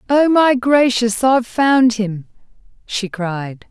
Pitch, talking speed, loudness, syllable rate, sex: 235 Hz, 130 wpm, -16 LUFS, 3.4 syllables/s, female